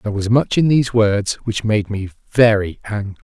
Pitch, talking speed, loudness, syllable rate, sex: 110 Hz, 200 wpm, -17 LUFS, 5.3 syllables/s, male